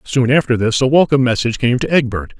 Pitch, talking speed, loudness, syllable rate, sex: 125 Hz, 225 wpm, -15 LUFS, 6.6 syllables/s, male